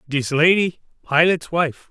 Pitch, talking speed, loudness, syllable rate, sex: 160 Hz, 125 wpm, -18 LUFS, 4.0 syllables/s, male